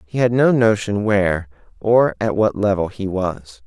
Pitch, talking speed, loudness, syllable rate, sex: 100 Hz, 180 wpm, -18 LUFS, 4.4 syllables/s, male